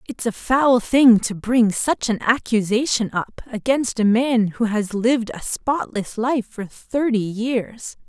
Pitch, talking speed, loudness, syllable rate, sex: 230 Hz, 165 wpm, -20 LUFS, 3.8 syllables/s, female